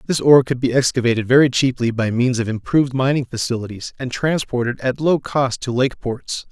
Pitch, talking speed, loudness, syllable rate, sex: 125 Hz, 195 wpm, -18 LUFS, 5.6 syllables/s, male